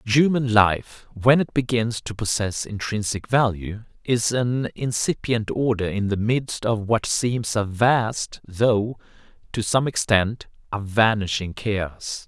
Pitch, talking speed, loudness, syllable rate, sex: 110 Hz, 135 wpm, -22 LUFS, 3.6 syllables/s, male